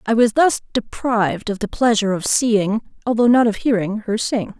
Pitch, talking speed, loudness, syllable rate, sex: 220 Hz, 195 wpm, -18 LUFS, 5.1 syllables/s, female